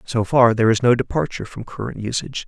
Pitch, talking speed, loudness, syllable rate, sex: 120 Hz, 220 wpm, -19 LUFS, 6.8 syllables/s, male